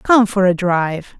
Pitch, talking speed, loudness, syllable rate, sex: 195 Hz, 200 wpm, -16 LUFS, 4.4 syllables/s, female